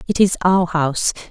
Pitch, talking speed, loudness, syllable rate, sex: 175 Hz, 185 wpm, -17 LUFS, 5.3 syllables/s, female